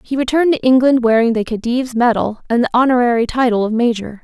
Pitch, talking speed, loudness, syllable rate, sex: 240 Hz, 200 wpm, -15 LUFS, 6.6 syllables/s, female